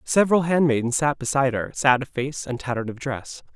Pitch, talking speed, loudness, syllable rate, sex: 135 Hz, 205 wpm, -22 LUFS, 5.7 syllables/s, male